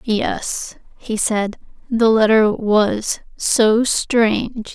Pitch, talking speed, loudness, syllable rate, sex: 220 Hz, 100 wpm, -17 LUFS, 2.5 syllables/s, female